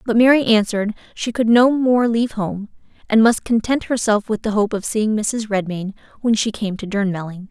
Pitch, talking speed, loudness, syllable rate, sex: 220 Hz, 200 wpm, -18 LUFS, 5.2 syllables/s, female